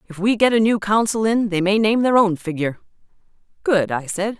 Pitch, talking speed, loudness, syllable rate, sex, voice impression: 205 Hz, 220 wpm, -19 LUFS, 5.6 syllables/s, female, very feminine, slightly young, very adult-like, thin, slightly tensed, slightly weak, very bright, soft, very clear, very fluent, cute, slightly cool, intellectual, very refreshing, slightly sincere, calm, very friendly, very reassuring, slightly unique, elegant, wild, very sweet, lively, kind, slightly intense, light